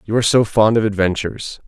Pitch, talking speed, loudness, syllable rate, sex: 105 Hz, 215 wpm, -16 LUFS, 6.5 syllables/s, male